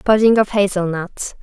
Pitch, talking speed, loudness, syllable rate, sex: 195 Hz, 125 wpm, -17 LUFS, 4.7 syllables/s, female